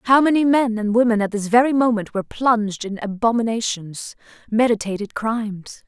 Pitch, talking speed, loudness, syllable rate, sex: 225 Hz, 145 wpm, -19 LUFS, 5.3 syllables/s, female